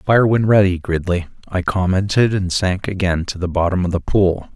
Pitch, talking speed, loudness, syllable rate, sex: 95 Hz, 195 wpm, -18 LUFS, 4.9 syllables/s, male